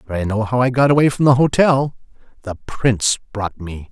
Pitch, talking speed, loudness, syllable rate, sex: 120 Hz, 215 wpm, -17 LUFS, 5.5 syllables/s, male